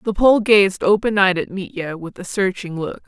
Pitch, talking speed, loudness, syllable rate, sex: 195 Hz, 215 wpm, -18 LUFS, 4.7 syllables/s, female